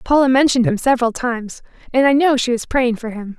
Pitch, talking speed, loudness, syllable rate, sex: 245 Hz, 230 wpm, -17 LUFS, 6.3 syllables/s, female